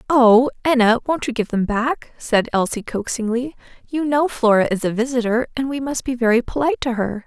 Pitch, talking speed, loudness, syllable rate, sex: 245 Hz, 200 wpm, -19 LUFS, 5.5 syllables/s, female